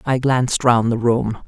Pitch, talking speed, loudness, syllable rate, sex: 120 Hz, 205 wpm, -17 LUFS, 4.7 syllables/s, female